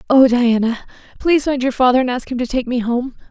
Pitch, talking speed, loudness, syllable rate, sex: 250 Hz, 235 wpm, -17 LUFS, 6.2 syllables/s, female